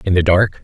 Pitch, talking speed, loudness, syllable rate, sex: 90 Hz, 285 wpm, -14 LUFS, 5.7 syllables/s, male